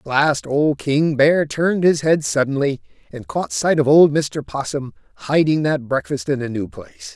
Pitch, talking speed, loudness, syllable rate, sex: 135 Hz, 195 wpm, -18 LUFS, 4.6 syllables/s, male